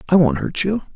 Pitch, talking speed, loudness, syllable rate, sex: 200 Hz, 250 wpm, -19 LUFS, 5.9 syllables/s, male